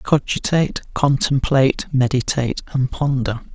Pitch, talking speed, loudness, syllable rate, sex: 135 Hz, 85 wpm, -19 LUFS, 4.4 syllables/s, male